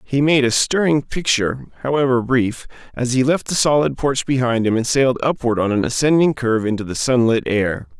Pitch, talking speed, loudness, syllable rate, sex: 125 Hz, 195 wpm, -18 LUFS, 5.5 syllables/s, male